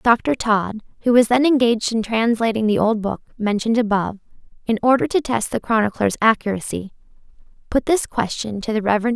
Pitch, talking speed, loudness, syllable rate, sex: 225 Hz, 170 wpm, -19 LUFS, 5.5 syllables/s, female